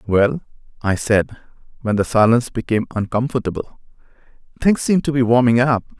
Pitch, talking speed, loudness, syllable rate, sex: 120 Hz, 140 wpm, -18 LUFS, 5.7 syllables/s, male